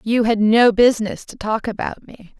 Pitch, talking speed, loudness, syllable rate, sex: 220 Hz, 200 wpm, -17 LUFS, 4.9 syllables/s, female